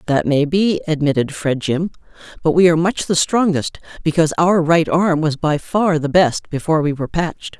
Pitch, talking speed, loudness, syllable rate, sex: 160 Hz, 190 wpm, -17 LUFS, 5.4 syllables/s, female